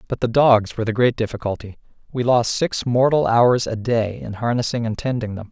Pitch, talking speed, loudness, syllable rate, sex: 115 Hz, 205 wpm, -19 LUFS, 5.4 syllables/s, male